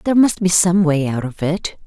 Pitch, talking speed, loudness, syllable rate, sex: 170 Hz, 255 wpm, -17 LUFS, 5.3 syllables/s, female